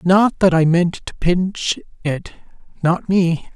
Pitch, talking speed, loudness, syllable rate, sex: 175 Hz, 135 wpm, -18 LUFS, 3.4 syllables/s, male